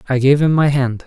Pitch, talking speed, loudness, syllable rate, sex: 135 Hz, 280 wpm, -15 LUFS, 5.6 syllables/s, male